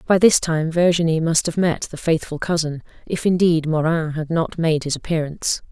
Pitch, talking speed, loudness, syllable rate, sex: 160 Hz, 190 wpm, -20 LUFS, 5.1 syllables/s, female